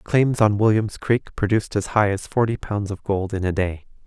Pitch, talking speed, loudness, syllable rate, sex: 105 Hz, 220 wpm, -21 LUFS, 4.9 syllables/s, male